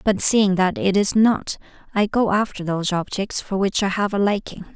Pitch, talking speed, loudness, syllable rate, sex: 195 Hz, 215 wpm, -20 LUFS, 5.0 syllables/s, female